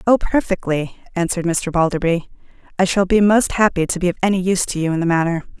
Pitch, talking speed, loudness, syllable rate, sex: 180 Hz, 215 wpm, -18 LUFS, 6.6 syllables/s, female